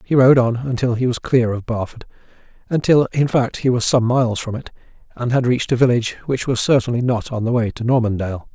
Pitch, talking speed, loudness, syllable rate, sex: 120 Hz, 225 wpm, -18 LUFS, 6.0 syllables/s, male